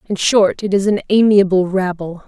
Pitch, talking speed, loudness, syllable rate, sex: 195 Hz, 185 wpm, -15 LUFS, 4.8 syllables/s, female